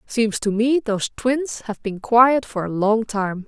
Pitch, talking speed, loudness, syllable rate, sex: 225 Hz, 205 wpm, -20 LUFS, 4.0 syllables/s, female